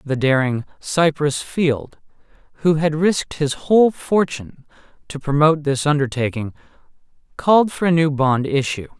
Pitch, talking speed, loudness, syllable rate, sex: 150 Hz, 135 wpm, -18 LUFS, 4.8 syllables/s, male